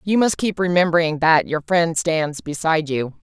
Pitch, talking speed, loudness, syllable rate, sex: 165 Hz, 185 wpm, -19 LUFS, 4.8 syllables/s, female